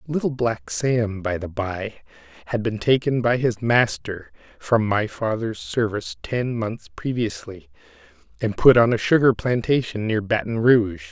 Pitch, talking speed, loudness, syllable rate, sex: 115 Hz, 150 wpm, -22 LUFS, 4.4 syllables/s, male